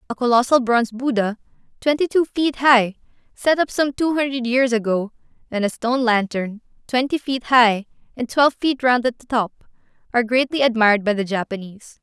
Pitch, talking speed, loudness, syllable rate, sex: 245 Hz, 175 wpm, -19 LUFS, 5.5 syllables/s, female